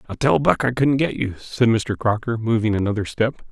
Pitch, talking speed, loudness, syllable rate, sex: 115 Hz, 220 wpm, -20 LUFS, 5.2 syllables/s, male